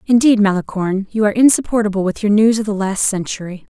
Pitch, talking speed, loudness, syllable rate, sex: 210 Hz, 190 wpm, -16 LUFS, 6.5 syllables/s, female